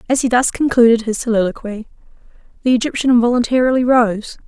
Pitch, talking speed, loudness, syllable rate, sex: 235 Hz, 135 wpm, -15 LUFS, 6.4 syllables/s, female